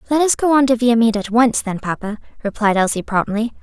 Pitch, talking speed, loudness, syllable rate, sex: 230 Hz, 215 wpm, -17 LUFS, 6.2 syllables/s, female